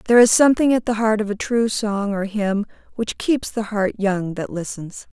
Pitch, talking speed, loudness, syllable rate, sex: 215 Hz, 220 wpm, -20 LUFS, 5.0 syllables/s, female